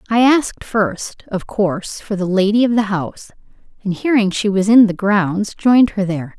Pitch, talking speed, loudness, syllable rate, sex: 205 Hz, 195 wpm, -16 LUFS, 5.0 syllables/s, female